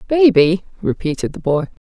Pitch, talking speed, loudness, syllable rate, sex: 185 Hz, 125 wpm, -17 LUFS, 5.2 syllables/s, female